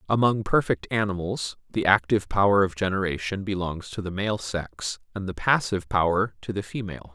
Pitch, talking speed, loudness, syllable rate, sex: 100 Hz, 170 wpm, -25 LUFS, 5.5 syllables/s, male